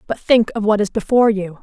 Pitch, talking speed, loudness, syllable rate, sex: 210 Hz, 260 wpm, -16 LUFS, 6.1 syllables/s, female